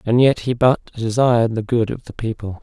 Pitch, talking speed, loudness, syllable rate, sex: 115 Hz, 230 wpm, -18 LUFS, 5.1 syllables/s, male